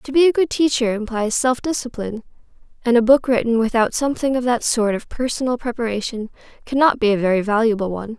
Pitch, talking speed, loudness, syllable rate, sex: 240 Hz, 190 wpm, -19 LUFS, 6.3 syllables/s, female